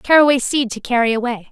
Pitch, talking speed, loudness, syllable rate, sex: 250 Hz, 200 wpm, -16 LUFS, 6.1 syllables/s, female